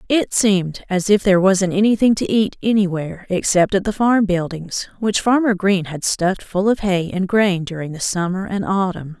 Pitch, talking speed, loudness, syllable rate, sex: 190 Hz, 195 wpm, -18 LUFS, 5.0 syllables/s, female